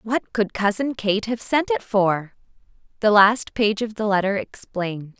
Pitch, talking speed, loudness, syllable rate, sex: 210 Hz, 175 wpm, -21 LUFS, 4.3 syllables/s, female